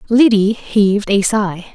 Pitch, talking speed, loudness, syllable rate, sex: 205 Hz, 140 wpm, -14 LUFS, 3.8 syllables/s, female